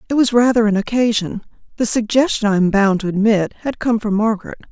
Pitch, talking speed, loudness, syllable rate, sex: 220 Hz, 205 wpm, -16 LUFS, 6.1 syllables/s, female